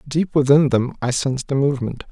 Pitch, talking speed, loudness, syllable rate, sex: 135 Hz, 200 wpm, -19 LUFS, 6.0 syllables/s, male